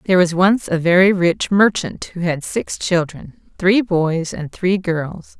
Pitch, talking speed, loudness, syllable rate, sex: 180 Hz, 180 wpm, -17 LUFS, 3.9 syllables/s, female